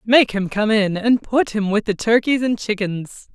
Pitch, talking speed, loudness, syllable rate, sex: 215 Hz, 215 wpm, -18 LUFS, 4.4 syllables/s, female